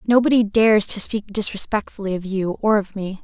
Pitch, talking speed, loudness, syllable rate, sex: 205 Hz, 185 wpm, -20 LUFS, 5.6 syllables/s, female